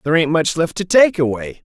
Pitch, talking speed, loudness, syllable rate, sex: 160 Hz, 245 wpm, -16 LUFS, 5.8 syllables/s, male